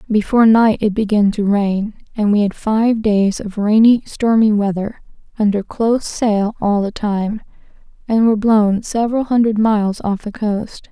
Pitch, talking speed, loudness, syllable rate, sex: 215 Hz, 165 wpm, -16 LUFS, 4.6 syllables/s, female